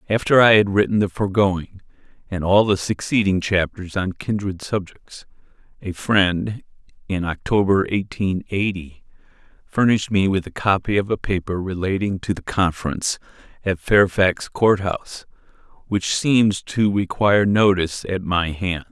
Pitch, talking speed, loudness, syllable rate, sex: 95 Hz, 140 wpm, -20 LUFS, 4.6 syllables/s, male